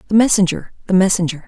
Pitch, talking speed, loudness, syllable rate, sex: 185 Hz, 165 wpm, -15 LUFS, 7.1 syllables/s, female